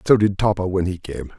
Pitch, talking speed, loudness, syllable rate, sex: 95 Hz, 260 wpm, -20 LUFS, 5.8 syllables/s, male